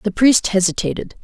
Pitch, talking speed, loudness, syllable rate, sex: 205 Hz, 145 wpm, -16 LUFS, 5.5 syllables/s, female